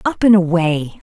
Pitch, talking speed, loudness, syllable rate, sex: 185 Hz, 160 wpm, -15 LUFS, 4.3 syllables/s, female